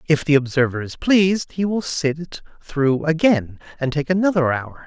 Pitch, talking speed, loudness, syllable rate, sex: 155 Hz, 185 wpm, -19 LUFS, 4.9 syllables/s, male